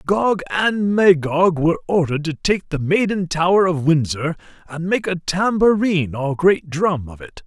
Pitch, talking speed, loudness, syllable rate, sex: 170 Hz, 170 wpm, -18 LUFS, 4.6 syllables/s, male